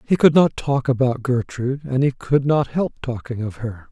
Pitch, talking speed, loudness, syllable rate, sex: 130 Hz, 215 wpm, -20 LUFS, 5.1 syllables/s, male